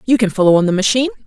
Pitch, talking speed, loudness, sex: 220 Hz, 285 wpm, -14 LUFS, female